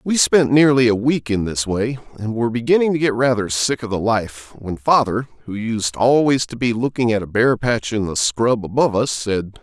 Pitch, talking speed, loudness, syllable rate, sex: 120 Hz, 225 wpm, -18 LUFS, 5.1 syllables/s, male